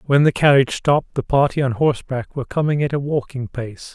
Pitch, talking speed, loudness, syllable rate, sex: 135 Hz, 215 wpm, -19 LUFS, 6.1 syllables/s, male